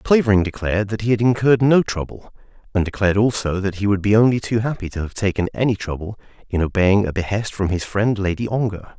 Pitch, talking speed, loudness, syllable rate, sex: 105 Hz, 215 wpm, -19 LUFS, 6.2 syllables/s, male